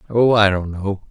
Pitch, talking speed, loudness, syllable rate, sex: 100 Hz, 215 wpm, -17 LUFS, 5.0 syllables/s, male